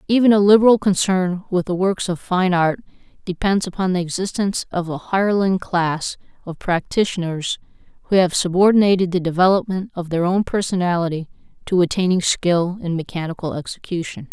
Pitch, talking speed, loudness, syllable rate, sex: 180 Hz, 145 wpm, -19 LUFS, 5.5 syllables/s, female